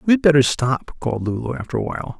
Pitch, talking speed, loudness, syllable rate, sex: 145 Hz, 245 wpm, -20 LUFS, 6.8 syllables/s, male